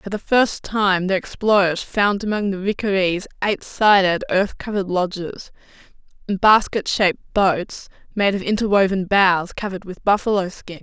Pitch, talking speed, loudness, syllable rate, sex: 195 Hz, 150 wpm, -19 LUFS, 4.9 syllables/s, female